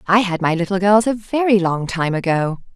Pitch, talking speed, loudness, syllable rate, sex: 190 Hz, 220 wpm, -18 LUFS, 5.3 syllables/s, female